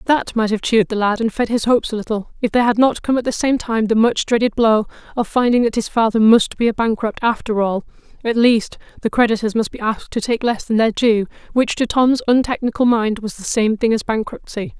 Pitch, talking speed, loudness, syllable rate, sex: 225 Hz, 245 wpm, -17 LUFS, 5.8 syllables/s, female